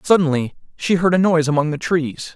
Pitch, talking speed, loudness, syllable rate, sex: 160 Hz, 205 wpm, -18 LUFS, 5.9 syllables/s, male